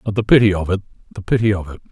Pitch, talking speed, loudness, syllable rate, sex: 100 Hz, 250 wpm, -17 LUFS, 8.1 syllables/s, male